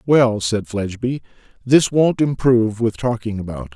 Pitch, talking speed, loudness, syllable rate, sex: 115 Hz, 145 wpm, -18 LUFS, 4.8 syllables/s, male